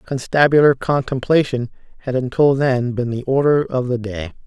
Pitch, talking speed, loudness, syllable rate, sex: 130 Hz, 150 wpm, -18 LUFS, 4.8 syllables/s, male